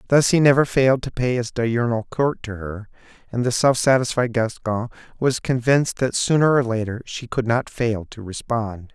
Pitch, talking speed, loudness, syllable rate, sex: 120 Hz, 190 wpm, -21 LUFS, 4.9 syllables/s, male